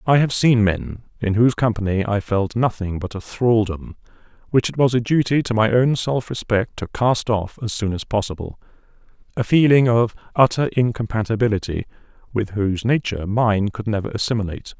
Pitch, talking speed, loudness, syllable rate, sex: 110 Hz, 170 wpm, -20 LUFS, 5.4 syllables/s, male